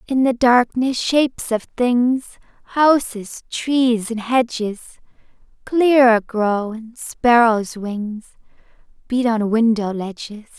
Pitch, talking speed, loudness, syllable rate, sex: 235 Hz, 110 wpm, -18 LUFS, 3.2 syllables/s, female